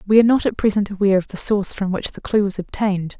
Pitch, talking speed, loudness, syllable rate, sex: 200 Hz, 280 wpm, -19 LUFS, 7.3 syllables/s, female